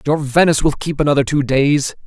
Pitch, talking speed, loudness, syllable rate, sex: 145 Hz, 205 wpm, -16 LUFS, 6.2 syllables/s, male